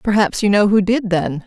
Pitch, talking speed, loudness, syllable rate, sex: 200 Hz, 245 wpm, -16 LUFS, 5.1 syllables/s, female